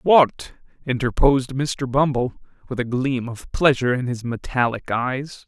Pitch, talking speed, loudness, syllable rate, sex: 130 Hz, 140 wpm, -21 LUFS, 4.5 syllables/s, male